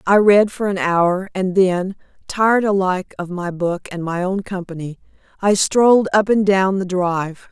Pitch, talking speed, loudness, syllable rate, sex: 190 Hz, 185 wpm, -17 LUFS, 4.6 syllables/s, female